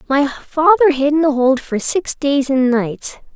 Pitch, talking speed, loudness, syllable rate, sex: 285 Hz, 195 wpm, -15 LUFS, 4.1 syllables/s, female